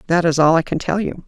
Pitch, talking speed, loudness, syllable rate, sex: 170 Hz, 330 wpm, -17 LUFS, 6.4 syllables/s, female